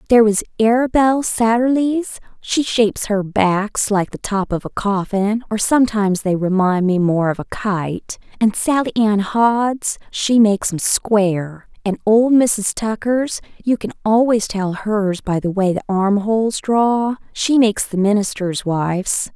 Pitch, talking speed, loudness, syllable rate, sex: 210 Hz, 150 wpm, -17 LUFS, 4.3 syllables/s, female